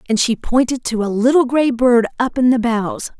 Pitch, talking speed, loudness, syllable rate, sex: 240 Hz, 225 wpm, -16 LUFS, 4.9 syllables/s, female